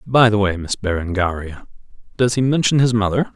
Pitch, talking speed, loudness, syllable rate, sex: 105 Hz, 180 wpm, -18 LUFS, 5.4 syllables/s, male